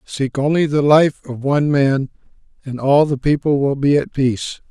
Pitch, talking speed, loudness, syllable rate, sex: 140 Hz, 190 wpm, -17 LUFS, 4.8 syllables/s, male